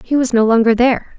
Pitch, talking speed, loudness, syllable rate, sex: 240 Hz, 255 wpm, -14 LUFS, 6.4 syllables/s, female